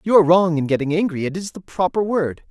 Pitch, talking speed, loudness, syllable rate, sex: 170 Hz, 265 wpm, -19 LUFS, 6.3 syllables/s, male